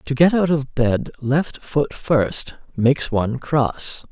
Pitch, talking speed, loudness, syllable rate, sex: 135 Hz, 160 wpm, -20 LUFS, 3.5 syllables/s, male